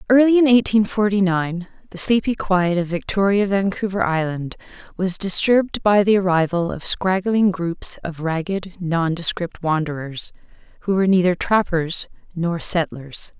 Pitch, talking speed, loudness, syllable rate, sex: 185 Hz, 135 wpm, -19 LUFS, 4.6 syllables/s, female